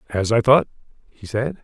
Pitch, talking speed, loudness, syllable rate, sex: 120 Hz, 185 wpm, -19 LUFS, 5.0 syllables/s, male